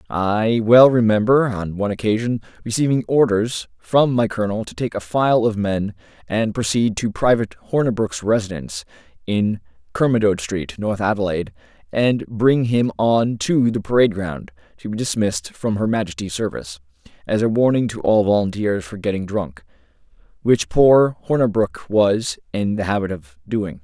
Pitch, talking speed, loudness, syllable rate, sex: 105 Hz, 155 wpm, -19 LUFS, 5.0 syllables/s, male